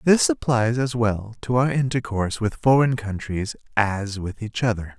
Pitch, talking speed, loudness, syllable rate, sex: 115 Hz, 170 wpm, -22 LUFS, 4.5 syllables/s, male